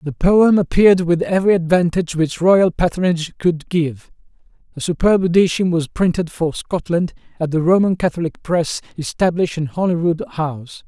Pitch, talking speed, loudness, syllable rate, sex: 170 Hz, 150 wpm, -17 LUFS, 5.3 syllables/s, male